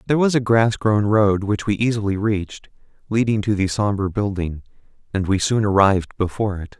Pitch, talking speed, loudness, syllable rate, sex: 105 Hz, 185 wpm, -20 LUFS, 5.6 syllables/s, male